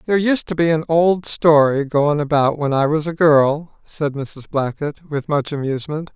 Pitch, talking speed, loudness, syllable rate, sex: 150 Hz, 195 wpm, -18 LUFS, 4.6 syllables/s, male